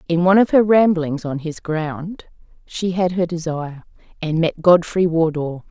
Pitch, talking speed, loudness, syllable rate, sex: 170 Hz, 170 wpm, -18 LUFS, 4.6 syllables/s, female